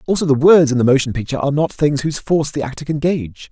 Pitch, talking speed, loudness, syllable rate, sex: 145 Hz, 275 wpm, -16 LUFS, 7.5 syllables/s, male